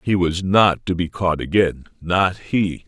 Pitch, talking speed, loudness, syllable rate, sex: 90 Hz, 190 wpm, -19 LUFS, 3.8 syllables/s, male